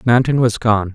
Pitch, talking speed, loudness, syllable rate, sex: 115 Hz, 190 wpm, -15 LUFS, 4.8 syllables/s, male